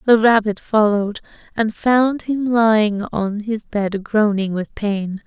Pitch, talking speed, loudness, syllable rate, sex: 215 Hz, 150 wpm, -18 LUFS, 3.8 syllables/s, female